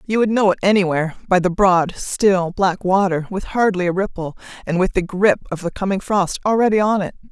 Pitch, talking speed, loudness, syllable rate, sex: 190 Hz, 215 wpm, -18 LUFS, 5.6 syllables/s, female